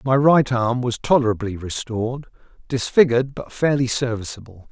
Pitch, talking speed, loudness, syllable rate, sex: 125 Hz, 125 wpm, -20 LUFS, 5.3 syllables/s, male